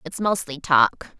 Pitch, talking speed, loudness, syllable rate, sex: 160 Hz, 150 wpm, -21 LUFS, 3.7 syllables/s, female